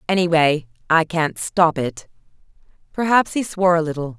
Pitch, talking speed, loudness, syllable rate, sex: 165 Hz, 145 wpm, -19 LUFS, 5.0 syllables/s, female